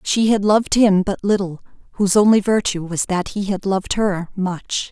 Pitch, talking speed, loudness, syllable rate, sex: 195 Hz, 195 wpm, -18 LUFS, 5.1 syllables/s, female